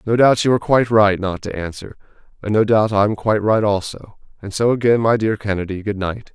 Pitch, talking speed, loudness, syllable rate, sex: 105 Hz, 225 wpm, -17 LUFS, 5.9 syllables/s, male